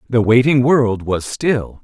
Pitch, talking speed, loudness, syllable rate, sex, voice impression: 120 Hz, 165 wpm, -15 LUFS, 3.6 syllables/s, male, very masculine, very middle-aged, very thick, slightly tensed, slightly weak, slightly bright, slightly soft, slightly muffled, fluent, slightly raspy, cool, very intellectual, refreshing, sincere, calm, slightly mature, very friendly, reassuring, unique, elegant, wild, sweet, slightly lively, kind, slightly modest